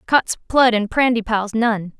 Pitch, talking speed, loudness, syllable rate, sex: 225 Hz, 150 wpm, -18 LUFS, 4.1 syllables/s, female